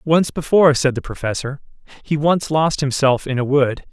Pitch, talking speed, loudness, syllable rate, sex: 145 Hz, 185 wpm, -18 LUFS, 5.1 syllables/s, male